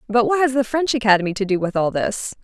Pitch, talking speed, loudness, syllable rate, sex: 230 Hz, 270 wpm, -19 LUFS, 6.4 syllables/s, female